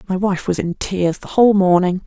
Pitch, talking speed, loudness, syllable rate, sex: 190 Hz, 235 wpm, -17 LUFS, 5.4 syllables/s, female